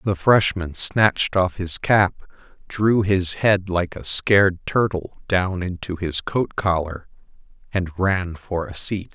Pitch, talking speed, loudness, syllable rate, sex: 95 Hz, 150 wpm, -21 LUFS, 3.7 syllables/s, male